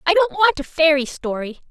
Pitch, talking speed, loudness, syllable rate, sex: 325 Hz, 210 wpm, -18 LUFS, 5.3 syllables/s, female